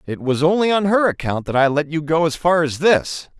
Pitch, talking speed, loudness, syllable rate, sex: 160 Hz, 265 wpm, -18 LUFS, 5.3 syllables/s, male